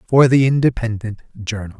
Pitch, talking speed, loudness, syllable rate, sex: 120 Hz, 135 wpm, -17 LUFS, 5.3 syllables/s, male